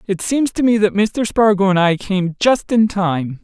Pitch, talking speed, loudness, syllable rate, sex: 200 Hz, 225 wpm, -16 LUFS, 4.3 syllables/s, male